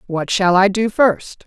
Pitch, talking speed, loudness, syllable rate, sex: 200 Hz, 205 wpm, -15 LUFS, 3.8 syllables/s, female